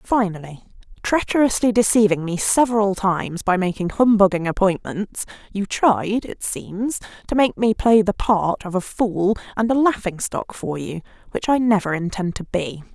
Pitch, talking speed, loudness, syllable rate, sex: 200 Hz, 160 wpm, -20 LUFS, 4.7 syllables/s, female